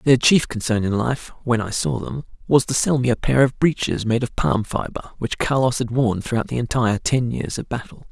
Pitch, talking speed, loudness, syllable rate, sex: 120 Hz, 235 wpm, -21 LUFS, 5.4 syllables/s, male